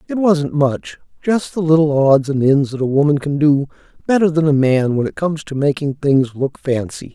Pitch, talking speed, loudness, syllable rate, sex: 150 Hz, 210 wpm, -16 LUFS, 5.0 syllables/s, male